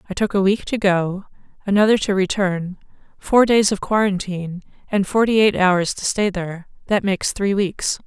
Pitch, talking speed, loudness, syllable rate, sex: 195 Hz, 180 wpm, -19 LUFS, 5.0 syllables/s, female